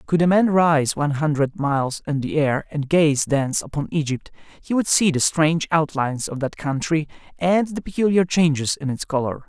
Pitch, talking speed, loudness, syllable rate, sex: 155 Hz, 195 wpm, -21 LUFS, 5.2 syllables/s, male